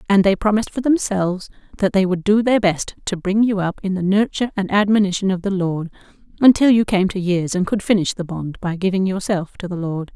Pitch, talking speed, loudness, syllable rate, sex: 195 Hz, 230 wpm, -19 LUFS, 5.8 syllables/s, female